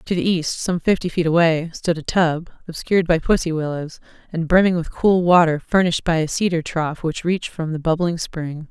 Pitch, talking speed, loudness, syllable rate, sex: 165 Hz, 205 wpm, -19 LUFS, 5.3 syllables/s, female